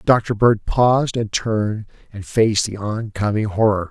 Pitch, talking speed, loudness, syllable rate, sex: 110 Hz, 155 wpm, -19 LUFS, 4.5 syllables/s, male